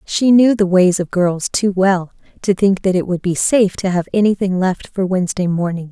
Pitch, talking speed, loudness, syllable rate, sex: 190 Hz, 225 wpm, -16 LUFS, 5.1 syllables/s, female